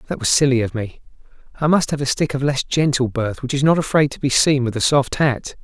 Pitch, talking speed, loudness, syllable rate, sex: 135 Hz, 265 wpm, -18 LUFS, 5.8 syllables/s, male